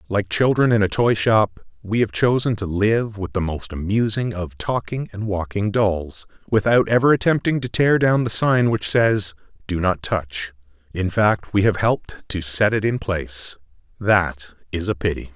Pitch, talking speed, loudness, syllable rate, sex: 100 Hz, 185 wpm, -20 LUFS, 4.5 syllables/s, male